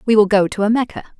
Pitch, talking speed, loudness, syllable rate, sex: 215 Hz, 300 wpm, -16 LUFS, 7.5 syllables/s, female